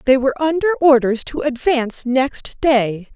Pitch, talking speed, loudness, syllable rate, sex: 265 Hz, 150 wpm, -17 LUFS, 4.6 syllables/s, female